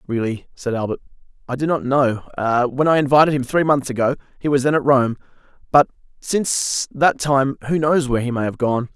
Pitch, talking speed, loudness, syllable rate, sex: 135 Hz, 200 wpm, -19 LUFS, 5.4 syllables/s, male